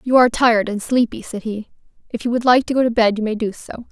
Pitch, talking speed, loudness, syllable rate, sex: 230 Hz, 290 wpm, -18 LUFS, 6.5 syllables/s, female